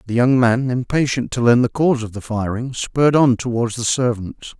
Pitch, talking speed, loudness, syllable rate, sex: 120 Hz, 210 wpm, -18 LUFS, 5.2 syllables/s, male